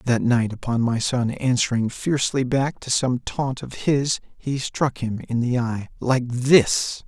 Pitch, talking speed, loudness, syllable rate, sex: 125 Hz, 180 wpm, -22 LUFS, 3.9 syllables/s, male